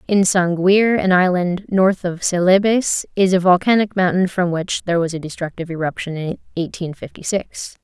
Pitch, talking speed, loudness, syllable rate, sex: 180 Hz, 170 wpm, -18 LUFS, 5.1 syllables/s, female